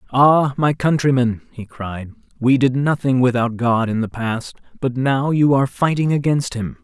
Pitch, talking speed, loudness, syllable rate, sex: 130 Hz, 175 wpm, -18 LUFS, 4.6 syllables/s, male